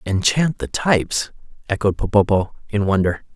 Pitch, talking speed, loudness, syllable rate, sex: 105 Hz, 125 wpm, -19 LUFS, 4.9 syllables/s, male